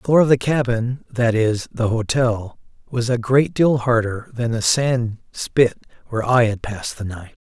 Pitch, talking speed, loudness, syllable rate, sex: 120 Hz, 180 wpm, -20 LUFS, 4.5 syllables/s, male